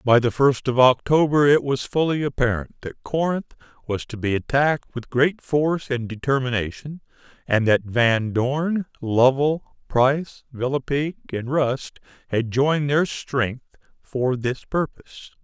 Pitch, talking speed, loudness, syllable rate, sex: 135 Hz, 140 wpm, -22 LUFS, 4.4 syllables/s, male